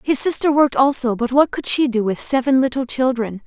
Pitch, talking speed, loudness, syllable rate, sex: 255 Hz, 225 wpm, -17 LUFS, 5.7 syllables/s, female